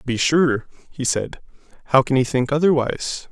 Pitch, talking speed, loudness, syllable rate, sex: 135 Hz, 180 wpm, -20 LUFS, 5.1 syllables/s, male